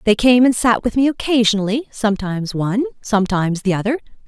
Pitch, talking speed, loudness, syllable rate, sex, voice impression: 225 Hz, 170 wpm, -17 LUFS, 6.5 syllables/s, female, feminine, adult-like, slightly bright, slightly fluent, refreshing, friendly